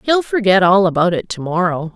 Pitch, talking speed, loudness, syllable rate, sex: 190 Hz, 215 wpm, -15 LUFS, 5.4 syllables/s, female